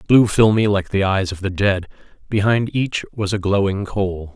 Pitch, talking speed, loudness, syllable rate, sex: 100 Hz, 195 wpm, -19 LUFS, 4.6 syllables/s, male